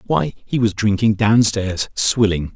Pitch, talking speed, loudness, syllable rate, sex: 105 Hz, 115 wpm, -17 LUFS, 3.9 syllables/s, male